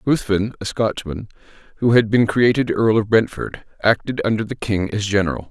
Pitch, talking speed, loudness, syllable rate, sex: 110 Hz, 175 wpm, -19 LUFS, 5.2 syllables/s, male